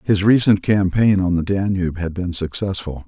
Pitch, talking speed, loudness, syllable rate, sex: 95 Hz, 175 wpm, -18 LUFS, 5.1 syllables/s, male